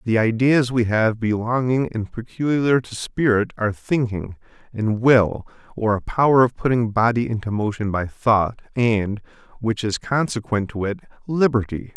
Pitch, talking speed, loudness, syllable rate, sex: 115 Hz, 150 wpm, -21 LUFS, 4.5 syllables/s, male